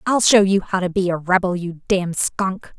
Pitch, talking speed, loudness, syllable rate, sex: 185 Hz, 235 wpm, -19 LUFS, 4.9 syllables/s, female